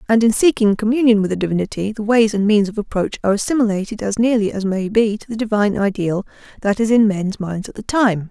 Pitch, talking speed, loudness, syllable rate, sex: 210 Hz, 230 wpm, -18 LUFS, 6.2 syllables/s, female